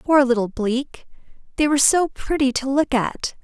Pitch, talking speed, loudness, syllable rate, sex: 270 Hz, 175 wpm, -20 LUFS, 4.6 syllables/s, female